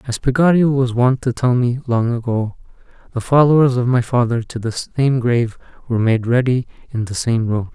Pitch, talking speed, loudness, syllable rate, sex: 120 Hz, 195 wpm, -17 LUFS, 5.3 syllables/s, male